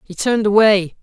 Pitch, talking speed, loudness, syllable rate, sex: 205 Hz, 175 wpm, -15 LUFS, 5.7 syllables/s, male